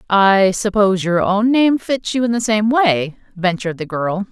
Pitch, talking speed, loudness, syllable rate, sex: 205 Hz, 195 wpm, -16 LUFS, 4.6 syllables/s, female